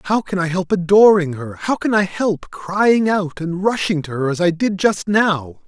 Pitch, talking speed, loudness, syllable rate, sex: 185 Hz, 220 wpm, -17 LUFS, 4.4 syllables/s, male